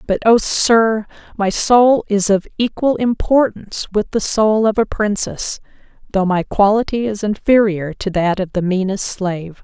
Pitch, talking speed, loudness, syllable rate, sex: 205 Hz, 160 wpm, -16 LUFS, 4.4 syllables/s, female